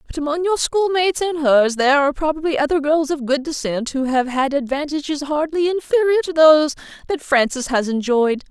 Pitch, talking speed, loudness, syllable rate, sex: 295 Hz, 185 wpm, -18 LUFS, 5.6 syllables/s, female